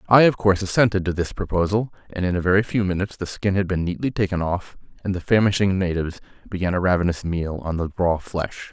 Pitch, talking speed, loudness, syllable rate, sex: 95 Hz, 220 wpm, -22 LUFS, 6.3 syllables/s, male